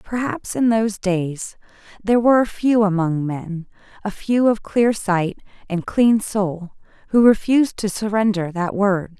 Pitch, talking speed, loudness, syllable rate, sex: 200 Hz, 155 wpm, -19 LUFS, 4.3 syllables/s, female